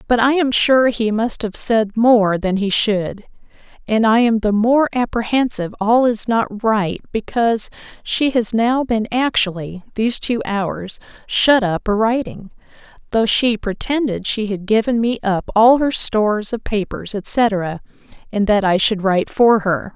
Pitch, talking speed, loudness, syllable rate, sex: 220 Hz, 165 wpm, -17 LUFS, 4.2 syllables/s, female